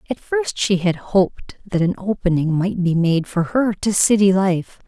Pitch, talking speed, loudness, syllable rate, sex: 190 Hz, 195 wpm, -19 LUFS, 4.5 syllables/s, female